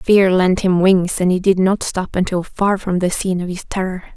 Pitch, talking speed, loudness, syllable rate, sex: 185 Hz, 245 wpm, -17 LUFS, 5.0 syllables/s, female